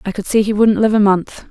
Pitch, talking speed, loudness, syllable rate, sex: 205 Hz, 320 wpm, -14 LUFS, 5.8 syllables/s, female